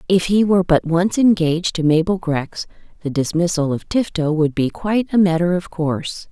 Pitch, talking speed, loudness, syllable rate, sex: 170 Hz, 190 wpm, -18 LUFS, 5.3 syllables/s, female